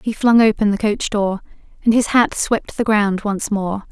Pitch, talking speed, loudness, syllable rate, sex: 210 Hz, 215 wpm, -17 LUFS, 4.4 syllables/s, female